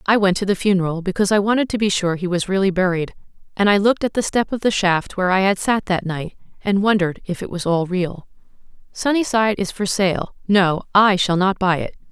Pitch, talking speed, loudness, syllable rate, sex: 195 Hz, 230 wpm, -19 LUFS, 5.9 syllables/s, female